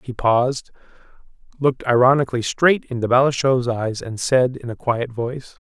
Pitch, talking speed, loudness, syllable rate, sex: 125 Hz, 150 wpm, -19 LUFS, 5.2 syllables/s, male